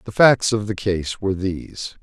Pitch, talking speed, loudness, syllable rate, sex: 100 Hz, 205 wpm, -20 LUFS, 4.9 syllables/s, male